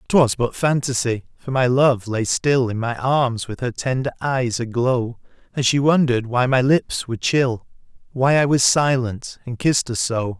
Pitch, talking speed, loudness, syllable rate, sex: 125 Hz, 185 wpm, -19 LUFS, 4.5 syllables/s, male